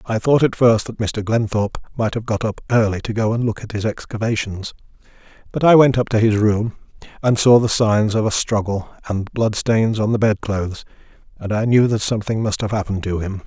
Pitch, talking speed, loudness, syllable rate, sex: 110 Hz, 225 wpm, -18 LUFS, 5.5 syllables/s, male